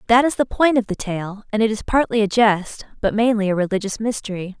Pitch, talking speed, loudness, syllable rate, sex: 215 Hz, 235 wpm, -19 LUFS, 5.8 syllables/s, female